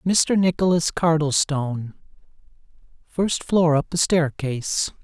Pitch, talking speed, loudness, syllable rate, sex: 160 Hz, 95 wpm, -21 LUFS, 4.0 syllables/s, male